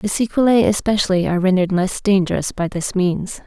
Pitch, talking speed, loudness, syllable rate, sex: 190 Hz, 175 wpm, -18 LUFS, 5.9 syllables/s, female